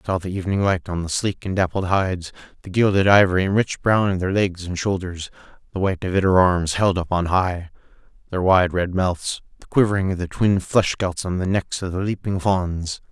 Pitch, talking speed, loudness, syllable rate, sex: 95 Hz, 225 wpm, -21 LUFS, 5.6 syllables/s, male